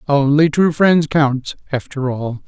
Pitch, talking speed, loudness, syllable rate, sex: 145 Hz, 145 wpm, -16 LUFS, 3.8 syllables/s, male